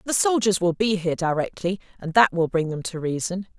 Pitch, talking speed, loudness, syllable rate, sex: 190 Hz, 220 wpm, -23 LUFS, 5.6 syllables/s, female